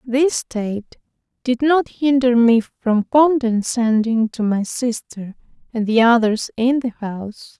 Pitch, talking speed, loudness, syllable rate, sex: 235 Hz, 135 wpm, -18 LUFS, 3.8 syllables/s, female